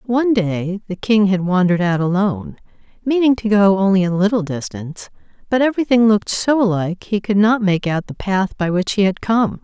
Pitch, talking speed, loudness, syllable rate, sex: 200 Hz, 200 wpm, -17 LUFS, 5.6 syllables/s, female